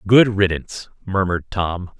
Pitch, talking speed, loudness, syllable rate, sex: 95 Hz, 120 wpm, -19 LUFS, 5.1 syllables/s, male